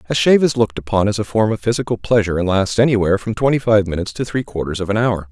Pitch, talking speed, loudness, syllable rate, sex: 105 Hz, 270 wpm, -17 LUFS, 7.4 syllables/s, male